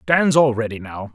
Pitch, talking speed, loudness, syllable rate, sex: 125 Hz, 155 wpm, -18 LUFS, 4.9 syllables/s, male